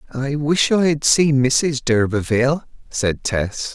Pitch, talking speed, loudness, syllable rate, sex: 135 Hz, 145 wpm, -18 LUFS, 3.8 syllables/s, male